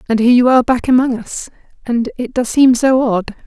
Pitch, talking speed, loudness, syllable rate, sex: 245 Hz, 225 wpm, -14 LUFS, 5.7 syllables/s, female